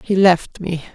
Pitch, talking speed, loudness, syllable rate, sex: 180 Hz, 190 wpm, -17 LUFS, 4.0 syllables/s, female